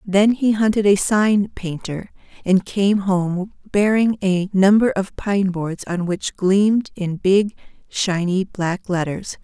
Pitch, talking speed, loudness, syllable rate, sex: 195 Hz, 145 wpm, -19 LUFS, 3.6 syllables/s, female